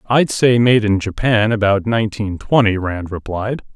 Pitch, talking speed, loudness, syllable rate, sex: 110 Hz, 160 wpm, -16 LUFS, 4.6 syllables/s, male